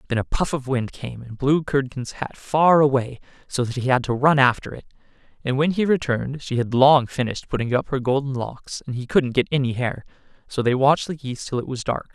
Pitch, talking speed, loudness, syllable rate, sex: 130 Hz, 235 wpm, -22 LUFS, 5.7 syllables/s, male